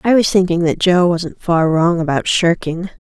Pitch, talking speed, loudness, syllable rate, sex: 175 Hz, 195 wpm, -15 LUFS, 4.6 syllables/s, female